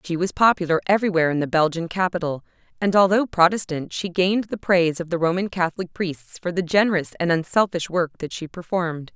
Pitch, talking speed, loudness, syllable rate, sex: 175 Hz, 190 wpm, -22 LUFS, 6.2 syllables/s, female